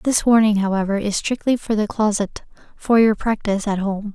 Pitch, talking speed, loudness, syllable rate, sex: 210 Hz, 190 wpm, -19 LUFS, 5.2 syllables/s, female